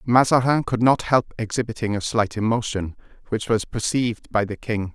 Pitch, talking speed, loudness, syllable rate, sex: 110 Hz, 170 wpm, -22 LUFS, 5.2 syllables/s, male